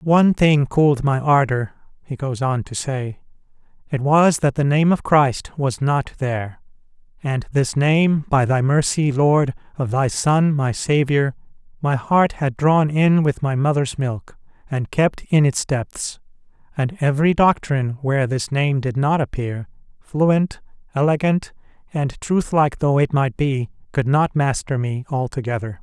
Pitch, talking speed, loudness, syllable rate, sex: 140 Hz, 160 wpm, -19 LUFS, 4.2 syllables/s, male